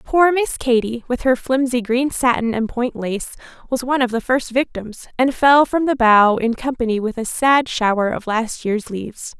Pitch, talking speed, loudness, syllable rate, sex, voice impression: 245 Hz, 205 wpm, -18 LUFS, 4.7 syllables/s, female, feminine, slightly adult-like, tensed, slightly fluent, sincere, lively